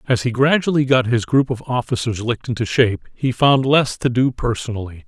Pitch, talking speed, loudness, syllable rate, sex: 125 Hz, 200 wpm, -18 LUFS, 5.6 syllables/s, male